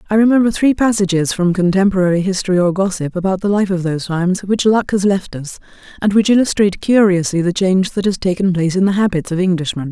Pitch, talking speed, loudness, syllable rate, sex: 190 Hz, 210 wpm, -15 LUFS, 6.5 syllables/s, female